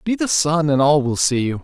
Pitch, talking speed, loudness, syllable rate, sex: 150 Hz, 295 wpm, -17 LUFS, 5.2 syllables/s, male